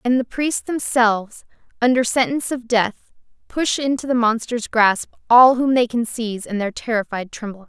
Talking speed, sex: 180 wpm, female